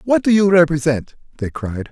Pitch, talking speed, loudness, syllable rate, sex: 160 Hz, 190 wpm, -16 LUFS, 5.1 syllables/s, male